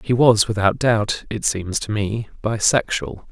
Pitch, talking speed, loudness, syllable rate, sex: 110 Hz, 165 wpm, -20 LUFS, 4.0 syllables/s, male